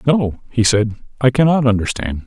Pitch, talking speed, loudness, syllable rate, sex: 120 Hz, 160 wpm, -16 LUFS, 5.1 syllables/s, male